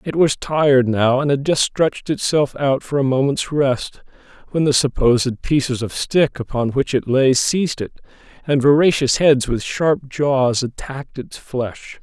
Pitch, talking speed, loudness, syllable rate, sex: 135 Hz, 175 wpm, -18 LUFS, 4.5 syllables/s, male